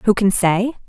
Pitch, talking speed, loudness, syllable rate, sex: 205 Hz, 205 wpm, -17 LUFS, 4.2 syllables/s, female